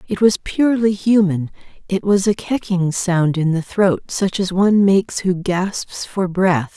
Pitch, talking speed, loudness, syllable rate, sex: 190 Hz, 180 wpm, -17 LUFS, 4.2 syllables/s, female